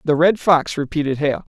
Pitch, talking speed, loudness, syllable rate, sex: 155 Hz, 195 wpm, -18 LUFS, 5.0 syllables/s, male